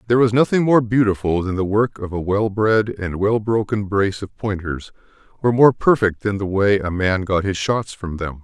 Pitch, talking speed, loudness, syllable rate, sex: 105 Hz, 220 wpm, -19 LUFS, 5.1 syllables/s, male